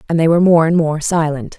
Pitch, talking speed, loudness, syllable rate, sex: 160 Hz, 265 wpm, -14 LUFS, 6.4 syllables/s, female